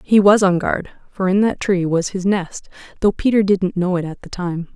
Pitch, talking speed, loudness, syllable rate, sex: 190 Hz, 240 wpm, -18 LUFS, 4.9 syllables/s, female